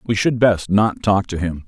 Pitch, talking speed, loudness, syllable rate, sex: 100 Hz, 250 wpm, -18 LUFS, 4.5 syllables/s, male